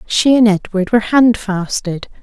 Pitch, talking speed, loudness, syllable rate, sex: 210 Hz, 135 wpm, -14 LUFS, 4.6 syllables/s, female